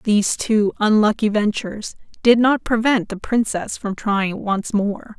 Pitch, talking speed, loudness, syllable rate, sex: 215 Hz, 150 wpm, -19 LUFS, 4.2 syllables/s, female